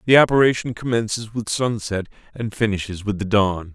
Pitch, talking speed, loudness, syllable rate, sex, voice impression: 110 Hz, 160 wpm, -21 LUFS, 5.4 syllables/s, male, masculine, very adult-like, cool, sincere, calm